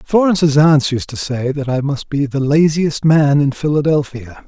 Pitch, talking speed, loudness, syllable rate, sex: 145 Hz, 190 wpm, -15 LUFS, 4.6 syllables/s, male